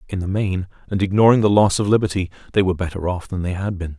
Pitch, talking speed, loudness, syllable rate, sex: 95 Hz, 255 wpm, -19 LUFS, 6.9 syllables/s, male